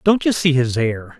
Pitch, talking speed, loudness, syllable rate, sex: 140 Hz, 250 wpm, -18 LUFS, 4.6 syllables/s, male